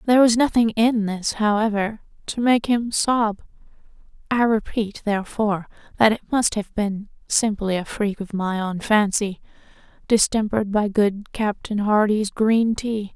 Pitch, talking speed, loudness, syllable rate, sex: 215 Hz, 145 wpm, -21 LUFS, 4.4 syllables/s, female